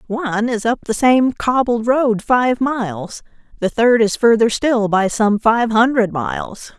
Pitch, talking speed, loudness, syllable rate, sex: 225 Hz, 170 wpm, -16 LUFS, 4.0 syllables/s, female